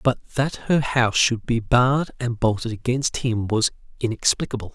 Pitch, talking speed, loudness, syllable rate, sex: 120 Hz, 165 wpm, -22 LUFS, 4.9 syllables/s, male